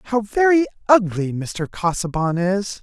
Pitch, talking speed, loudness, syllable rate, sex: 200 Hz, 125 wpm, -19 LUFS, 4.3 syllables/s, male